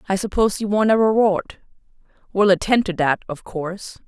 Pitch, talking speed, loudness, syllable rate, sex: 195 Hz, 160 wpm, -19 LUFS, 5.6 syllables/s, female